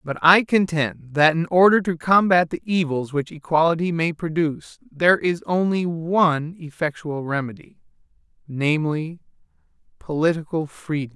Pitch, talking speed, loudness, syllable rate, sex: 160 Hz, 120 wpm, -20 LUFS, 4.8 syllables/s, male